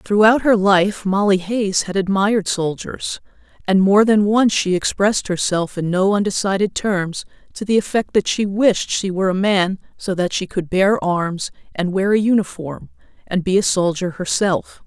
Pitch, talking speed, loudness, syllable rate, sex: 195 Hz, 180 wpm, -18 LUFS, 4.6 syllables/s, female